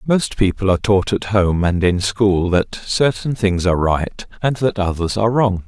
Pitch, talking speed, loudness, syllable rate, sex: 100 Hz, 200 wpm, -17 LUFS, 4.6 syllables/s, male